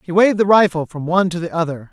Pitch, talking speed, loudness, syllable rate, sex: 175 Hz, 280 wpm, -16 LUFS, 7.2 syllables/s, male